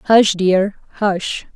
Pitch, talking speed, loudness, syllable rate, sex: 195 Hz, 115 wpm, -17 LUFS, 2.3 syllables/s, female